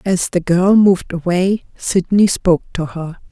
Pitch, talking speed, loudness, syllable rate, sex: 185 Hz, 165 wpm, -15 LUFS, 4.5 syllables/s, female